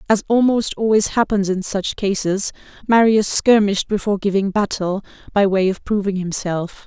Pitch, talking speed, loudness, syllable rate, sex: 200 Hz, 150 wpm, -18 LUFS, 5.0 syllables/s, female